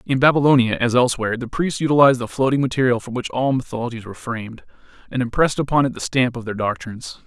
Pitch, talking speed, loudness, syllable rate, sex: 125 Hz, 205 wpm, -19 LUFS, 7.1 syllables/s, male